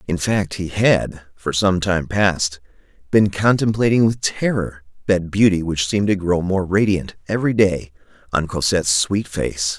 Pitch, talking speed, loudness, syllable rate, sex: 95 Hz, 160 wpm, -19 LUFS, 4.5 syllables/s, male